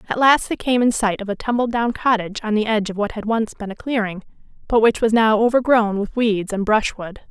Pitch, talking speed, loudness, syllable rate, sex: 220 Hz, 245 wpm, -19 LUFS, 5.7 syllables/s, female